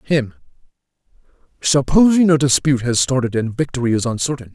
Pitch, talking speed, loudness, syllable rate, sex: 135 Hz, 130 wpm, -17 LUFS, 6.0 syllables/s, male